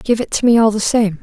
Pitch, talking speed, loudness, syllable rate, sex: 220 Hz, 345 wpm, -14 LUFS, 5.9 syllables/s, female